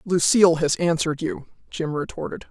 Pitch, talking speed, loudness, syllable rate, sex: 170 Hz, 145 wpm, -22 LUFS, 5.5 syllables/s, female